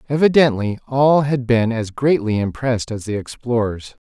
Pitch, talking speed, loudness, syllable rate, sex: 125 Hz, 145 wpm, -18 LUFS, 4.9 syllables/s, male